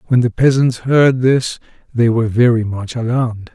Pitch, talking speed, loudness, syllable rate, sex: 120 Hz, 170 wpm, -15 LUFS, 5.0 syllables/s, male